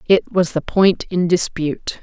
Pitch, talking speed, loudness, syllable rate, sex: 175 Hz, 180 wpm, -18 LUFS, 4.3 syllables/s, female